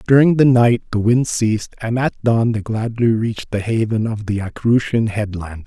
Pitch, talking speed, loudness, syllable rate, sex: 115 Hz, 190 wpm, -17 LUFS, 5.1 syllables/s, male